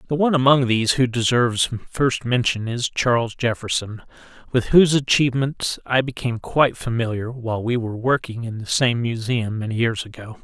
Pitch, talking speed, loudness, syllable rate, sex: 120 Hz, 165 wpm, -20 LUFS, 5.5 syllables/s, male